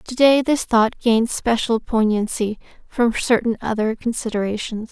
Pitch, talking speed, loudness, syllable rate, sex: 230 Hz, 120 wpm, -19 LUFS, 4.7 syllables/s, female